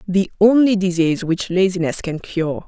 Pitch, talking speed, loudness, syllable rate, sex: 185 Hz, 155 wpm, -18 LUFS, 4.9 syllables/s, female